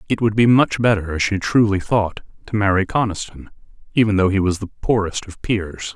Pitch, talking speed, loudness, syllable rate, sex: 100 Hz, 200 wpm, -19 LUFS, 5.4 syllables/s, male